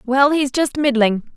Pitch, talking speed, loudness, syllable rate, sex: 265 Hz, 175 wpm, -17 LUFS, 4.1 syllables/s, female